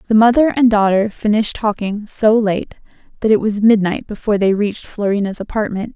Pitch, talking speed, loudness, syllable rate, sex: 210 Hz, 170 wpm, -16 LUFS, 5.7 syllables/s, female